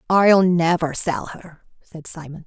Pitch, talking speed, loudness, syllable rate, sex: 170 Hz, 145 wpm, -18 LUFS, 3.8 syllables/s, female